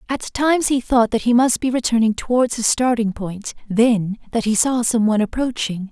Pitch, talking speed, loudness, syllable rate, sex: 230 Hz, 205 wpm, -18 LUFS, 5.2 syllables/s, female